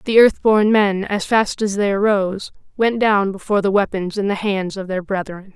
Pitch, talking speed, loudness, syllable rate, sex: 200 Hz, 215 wpm, -18 LUFS, 4.9 syllables/s, female